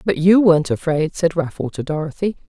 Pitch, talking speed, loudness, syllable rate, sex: 165 Hz, 190 wpm, -18 LUFS, 5.7 syllables/s, female